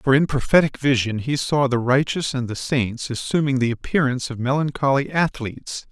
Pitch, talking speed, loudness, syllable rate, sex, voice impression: 135 Hz, 170 wpm, -21 LUFS, 5.3 syllables/s, male, masculine, adult-like, slightly thick, cool, sincere, slightly calm, friendly, slightly kind